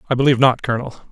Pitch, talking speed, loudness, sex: 130 Hz, 215 wpm, -17 LUFS, male